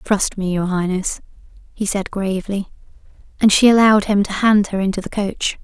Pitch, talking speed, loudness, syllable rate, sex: 200 Hz, 180 wpm, -17 LUFS, 5.4 syllables/s, female